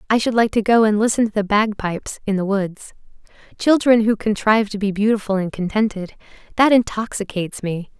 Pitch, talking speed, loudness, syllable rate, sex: 210 Hz, 175 wpm, -19 LUFS, 5.7 syllables/s, female